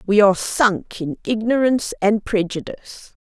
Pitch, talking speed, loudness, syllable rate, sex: 210 Hz, 130 wpm, -19 LUFS, 4.8 syllables/s, female